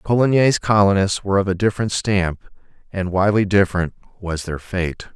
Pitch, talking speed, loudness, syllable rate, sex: 95 Hz, 150 wpm, -19 LUFS, 5.7 syllables/s, male